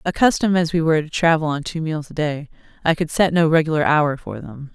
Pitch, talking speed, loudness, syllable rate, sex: 155 Hz, 240 wpm, -19 LUFS, 6.1 syllables/s, female